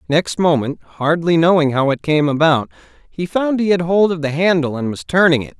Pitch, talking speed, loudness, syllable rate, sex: 155 Hz, 215 wpm, -16 LUFS, 5.3 syllables/s, male